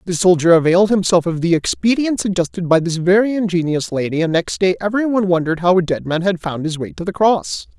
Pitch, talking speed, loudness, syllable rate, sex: 180 Hz, 225 wpm, -16 LUFS, 6.1 syllables/s, male